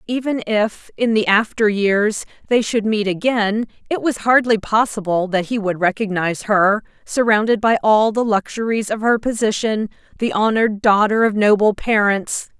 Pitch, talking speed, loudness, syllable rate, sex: 215 Hz, 155 wpm, -17 LUFS, 4.7 syllables/s, female